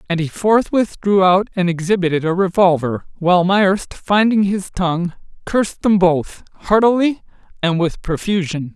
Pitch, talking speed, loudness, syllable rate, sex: 185 Hz, 145 wpm, -17 LUFS, 4.7 syllables/s, male